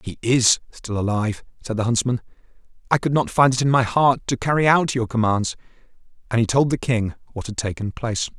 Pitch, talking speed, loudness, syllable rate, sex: 120 Hz, 205 wpm, -21 LUFS, 5.7 syllables/s, male